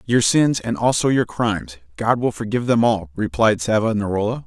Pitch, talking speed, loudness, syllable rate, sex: 110 Hz, 175 wpm, -19 LUFS, 5.4 syllables/s, male